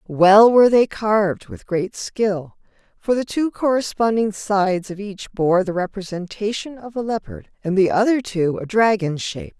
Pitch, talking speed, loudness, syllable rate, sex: 205 Hz, 170 wpm, -19 LUFS, 4.6 syllables/s, female